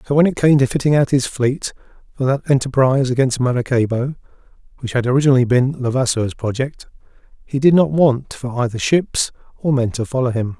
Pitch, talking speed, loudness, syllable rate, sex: 130 Hz, 180 wpm, -17 LUFS, 5.7 syllables/s, male